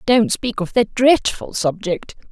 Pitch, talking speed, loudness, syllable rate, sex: 220 Hz, 155 wpm, -18 LUFS, 3.9 syllables/s, female